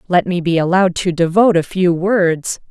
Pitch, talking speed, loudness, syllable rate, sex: 180 Hz, 200 wpm, -15 LUFS, 5.3 syllables/s, female